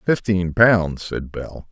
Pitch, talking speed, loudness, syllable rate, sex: 95 Hz, 140 wpm, -19 LUFS, 3.1 syllables/s, male